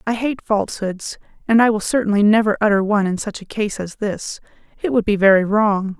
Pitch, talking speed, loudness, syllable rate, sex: 210 Hz, 210 wpm, -18 LUFS, 5.7 syllables/s, female